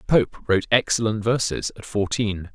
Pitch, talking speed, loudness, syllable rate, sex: 110 Hz, 140 wpm, -22 LUFS, 5.0 syllables/s, male